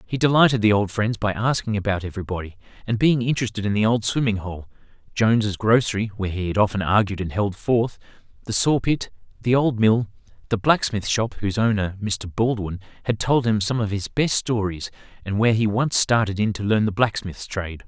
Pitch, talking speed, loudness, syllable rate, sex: 110 Hz, 200 wpm, -22 LUFS, 5.7 syllables/s, male